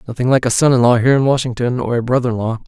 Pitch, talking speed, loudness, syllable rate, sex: 125 Hz, 315 wpm, -15 LUFS, 7.7 syllables/s, male